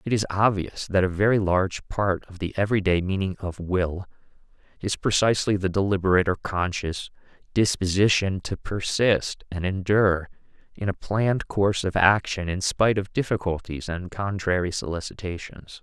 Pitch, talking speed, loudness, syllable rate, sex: 95 Hz, 145 wpm, -24 LUFS, 5.2 syllables/s, male